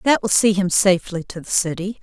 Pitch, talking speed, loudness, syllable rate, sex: 195 Hz, 235 wpm, -18 LUFS, 5.5 syllables/s, female